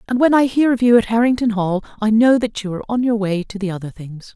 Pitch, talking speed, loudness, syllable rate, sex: 220 Hz, 290 wpm, -17 LUFS, 6.3 syllables/s, female